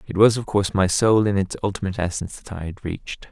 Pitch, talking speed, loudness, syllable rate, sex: 95 Hz, 255 wpm, -22 LUFS, 6.8 syllables/s, male